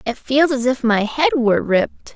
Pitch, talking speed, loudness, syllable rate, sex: 250 Hz, 225 wpm, -17 LUFS, 5.2 syllables/s, female